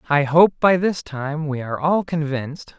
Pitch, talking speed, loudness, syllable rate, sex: 155 Hz, 195 wpm, -20 LUFS, 4.8 syllables/s, male